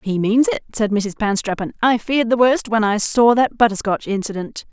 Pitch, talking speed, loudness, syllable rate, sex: 220 Hz, 205 wpm, -18 LUFS, 5.3 syllables/s, female